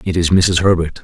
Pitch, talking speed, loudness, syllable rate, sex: 85 Hz, 230 wpm, -14 LUFS, 5.4 syllables/s, male